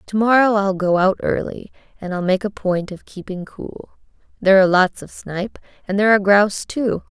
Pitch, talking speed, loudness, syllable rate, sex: 195 Hz, 195 wpm, -18 LUFS, 5.6 syllables/s, female